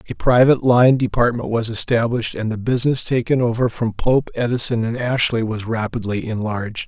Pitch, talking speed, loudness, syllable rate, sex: 115 Hz, 165 wpm, -19 LUFS, 5.6 syllables/s, male